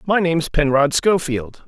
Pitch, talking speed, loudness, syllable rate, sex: 155 Hz, 145 wpm, -18 LUFS, 4.5 syllables/s, male